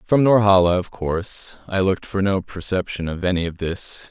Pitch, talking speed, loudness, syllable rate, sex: 95 Hz, 190 wpm, -20 LUFS, 5.1 syllables/s, male